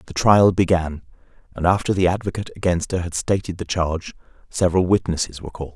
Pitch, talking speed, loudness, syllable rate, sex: 90 Hz, 175 wpm, -20 LUFS, 6.5 syllables/s, male